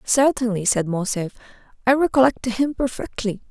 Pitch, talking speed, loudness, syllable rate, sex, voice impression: 235 Hz, 120 wpm, -21 LUFS, 5.0 syllables/s, female, very feminine, very adult-like, thin, slightly tensed, slightly powerful, bright, slightly hard, clear, fluent, raspy, cool, very intellectual, very refreshing, sincere, calm, very friendly, very reassuring, unique, elegant, wild, sweet, lively, kind, slightly intense, slightly light